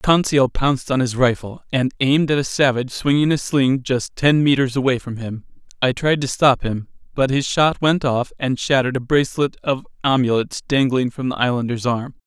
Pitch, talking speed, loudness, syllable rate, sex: 130 Hz, 195 wpm, -19 LUFS, 5.2 syllables/s, male